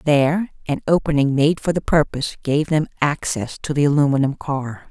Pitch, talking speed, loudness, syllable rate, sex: 145 Hz, 170 wpm, -19 LUFS, 5.3 syllables/s, female